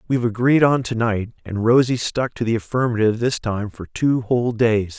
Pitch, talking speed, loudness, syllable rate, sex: 115 Hz, 205 wpm, -20 LUFS, 5.4 syllables/s, male